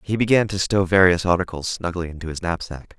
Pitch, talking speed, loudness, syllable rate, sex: 90 Hz, 200 wpm, -20 LUFS, 5.9 syllables/s, male